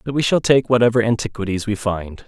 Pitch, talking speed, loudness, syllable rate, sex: 115 Hz, 210 wpm, -18 LUFS, 6.0 syllables/s, male